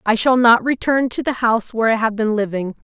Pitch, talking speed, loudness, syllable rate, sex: 230 Hz, 250 wpm, -17 LUFS, 6.0 syllables/s, female